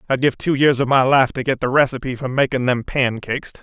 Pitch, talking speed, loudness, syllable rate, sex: 130 Hz, 250 wpm, -18 LUFS, 6.0 syllables/s, male